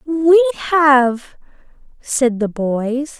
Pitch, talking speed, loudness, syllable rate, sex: 280 Hz, 95 wpm, -15 LUFS, 2.4 syllables/s, female